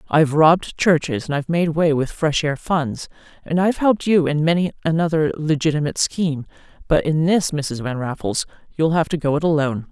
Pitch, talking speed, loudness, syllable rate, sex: 155 Hz, 195 wpm, -19 LUFS, 5.7 syllables/s, female